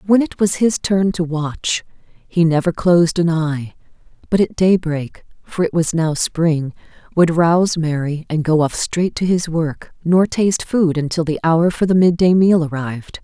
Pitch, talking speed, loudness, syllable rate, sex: 165 Hz, 180 wpm, -17 LUFS, 4.4 syllables/s, female